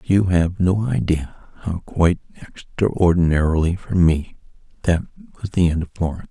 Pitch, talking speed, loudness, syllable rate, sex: 90 Hz, 145 wpm, -20 LUFS, 5.5 syllables/s, male